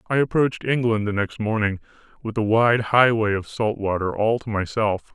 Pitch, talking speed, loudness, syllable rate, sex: 110 Hz, 185 wpm, -21 LUFS, 5.1 syllables/s, male